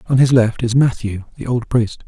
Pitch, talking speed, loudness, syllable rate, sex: 120 Hz, 230 wpm, -17 LUFS, 5.1 syllables/s, male